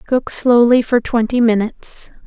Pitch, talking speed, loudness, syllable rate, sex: 235 Hz, 130 wpm, -14 LUFS, 4.5 syllables/s, female